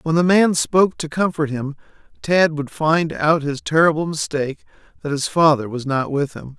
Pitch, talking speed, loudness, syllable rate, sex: 155 Hz, 190 wpm, -19 LUFS, 5.0 syllables/s, male